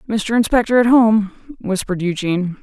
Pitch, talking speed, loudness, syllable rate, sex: 210 Hz, 135 wpm, -16 LUFS, 5.7 syllables/s, female